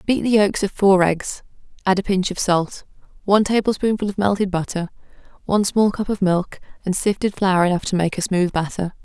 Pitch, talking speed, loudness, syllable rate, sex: 190 Hz, 200 wpm, -19 LUFS, 5.5 syllables/s, female